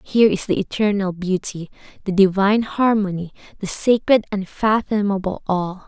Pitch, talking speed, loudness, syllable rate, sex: 200 Hz, 125 wpm, -19 LUFS, 5.0 syllables/s, female